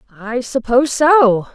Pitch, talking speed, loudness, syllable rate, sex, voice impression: 250 Hz, 115 wpm, -14 LUFS, 4.6 syllables/s, female, feminine, adult-like, tensed, powerful, bright, soft, slightly cute, friendly, reassuring, elegant, lively, kind